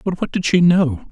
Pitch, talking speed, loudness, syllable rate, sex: 165 Hz, 270 wpm, -16 LUFS, 5.3 syllables/s, male